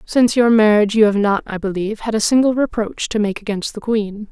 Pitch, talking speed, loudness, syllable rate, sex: 215 Hz, 235 wpm, -17 LUFS, 6.0 syllables/s, female